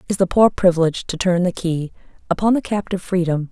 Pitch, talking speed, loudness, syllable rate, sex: 180 Hz, 205 wpm, -19 LUFS, 6.4 syllables/s, female